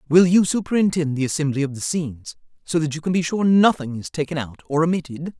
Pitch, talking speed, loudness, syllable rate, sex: 160 Hz, 225 wpm, -21 LUFS, 6.2 syllables/s, female